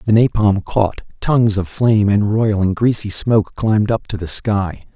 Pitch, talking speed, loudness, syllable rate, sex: 105 Hz, 180 wpm, -17 LUFS, 4.9 syllables/s, male